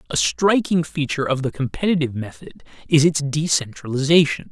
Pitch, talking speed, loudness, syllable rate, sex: 145 Hz, 135 wpm, -20 LUFS, 5.8 syllables/s, male